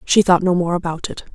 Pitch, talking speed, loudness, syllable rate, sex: 175 Hz, 265 wpm, -17 LUFS, 6.0 syllables/s, female